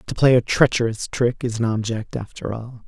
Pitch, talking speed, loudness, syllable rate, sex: 115 Hz, 210 wpm, -21 LUFS, 5.2 syllables/s, male